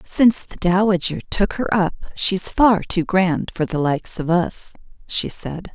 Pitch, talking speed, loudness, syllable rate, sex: 185 Hz, 175 wpm, -19 LUFS, 4.2 syllables/s, female